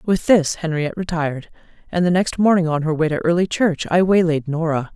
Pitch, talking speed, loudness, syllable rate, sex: 165 Hz, 205 wpm, -18 LUFS, 5.7 syllables/s, female